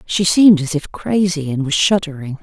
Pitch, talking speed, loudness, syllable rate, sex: 165 Hz, 200 wpm, -15 LUFS, 5.2 syllables/s, female